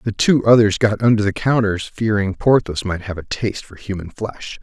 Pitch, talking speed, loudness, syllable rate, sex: 105 Hz, 205 wpm, -18 LUFS, 5.2 syllables/s, male